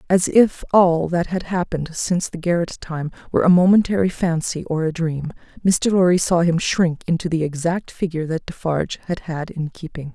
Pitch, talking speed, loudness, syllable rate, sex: 170 Hz, 190 wpm, -20 LUFS, 5.4 syllables/s, female